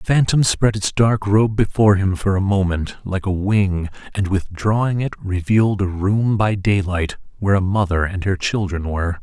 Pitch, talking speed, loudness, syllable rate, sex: 100 Hz, 190 wpm, -19 LUFS, 4.9 syllables/s, male